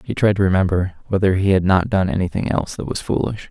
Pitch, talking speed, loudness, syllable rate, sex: 95 Hz, 240 wpm, -19 LUFS, 6.4 syllables/s, male